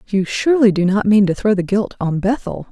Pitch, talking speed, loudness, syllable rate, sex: 205 Hz, 245 wpm, -16 LUFS, 5.5 syllables/s, female